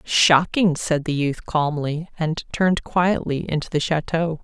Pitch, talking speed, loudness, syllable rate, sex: 160 Hz, 150 wpm, -21 LUFS, 4.1 syllables/s, female